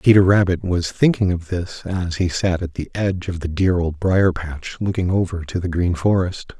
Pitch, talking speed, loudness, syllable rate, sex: 90 Hz, 220 wpm, -20 LUFS, 4.9 syllables/s, male